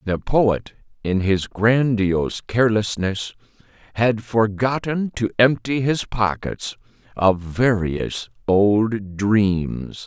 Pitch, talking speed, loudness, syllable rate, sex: 110 Hz, 95 wpm, -20 LUFS, 3.1 syllables/s, male